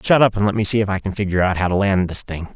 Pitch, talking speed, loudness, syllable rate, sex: 100 Hz, 375 wpm, -18 LUFS, 7.4 syllables/s, male